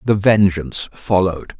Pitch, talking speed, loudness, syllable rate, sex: 95 Hz, 115 wpm, -17 LUFS, 5.1 syllables/s, male